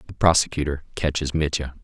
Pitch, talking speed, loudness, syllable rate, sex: 75 Hz, 130 wpm, -23 LUFS, 6.0 syllables/s, male